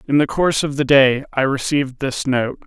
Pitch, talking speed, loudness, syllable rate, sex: 140 Hz, 225 wpm, -17 LUFS, 5.4 syllables/s, male